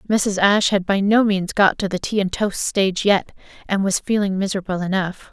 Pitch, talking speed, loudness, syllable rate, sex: 195 Hz, 215 wpm, -19 LUFS, 5.4 syllables/s, female